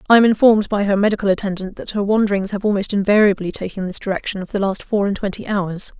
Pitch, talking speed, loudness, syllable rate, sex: 200 Hz, 230 wpm, -18 LUFS, 6.8 syllables/s, female